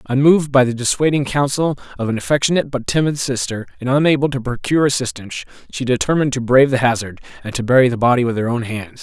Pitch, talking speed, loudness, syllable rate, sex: 130 Hz, 205 wpm, -17 LUFS, 6.9 syllables/s, male